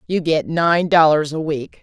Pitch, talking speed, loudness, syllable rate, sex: 160 Hz, 195 wpm, -17 LUFS, 4.2 syllables/s, female